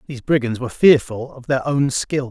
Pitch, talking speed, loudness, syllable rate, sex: 130 Hz, 210 wpm, -18 LUFS, 5.6 syllables/s, male